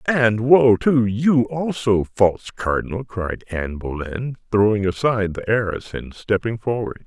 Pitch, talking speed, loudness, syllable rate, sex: 110 Hz, 145 wpm, -20 LUFS, 4.3 syllables/s, male